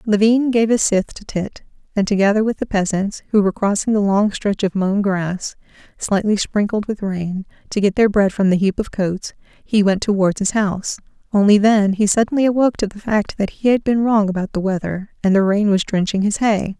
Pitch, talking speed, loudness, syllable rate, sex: 205 Hz, 220 wpm, -18 LUFS, 5.3 syllables/s, female